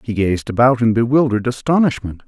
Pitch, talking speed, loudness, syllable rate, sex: 120 Hz, 160 wpm, -16 LUFS, 6.1 syllables/s, male